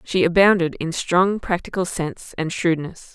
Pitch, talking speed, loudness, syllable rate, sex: 175 Hz, 155 wpm, -20 LUFS, 4.7 syllables/s, female